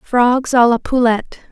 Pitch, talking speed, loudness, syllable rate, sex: 240 Hz, 160 wpm, -14 LUFS, 4.6 syllables/s, female